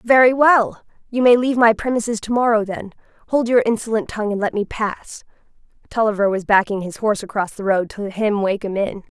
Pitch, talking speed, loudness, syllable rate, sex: 215 Hz, 195 wpm, -18 LUFS, 3.8 syllables/s, female